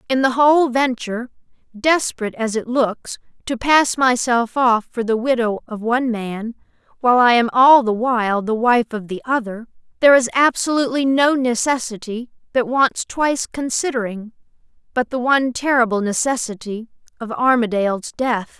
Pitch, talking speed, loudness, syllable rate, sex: 240 Hz, 140 wpm, -18 LUFS, 5.1 syllables/s, female